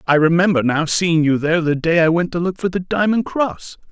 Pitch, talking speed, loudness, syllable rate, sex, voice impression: 170 Hz, 245 wpm, -17 LUFS, 5.5 syllables/s, male, very masculine, very adult-like, thick, cool, sincere, slightly wild